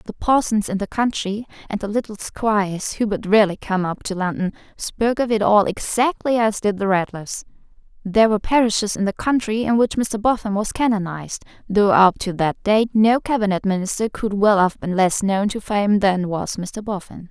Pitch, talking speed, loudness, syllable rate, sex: 205 Hz, 200 wpm, -20 LUFS, 5.2 syllables/s, female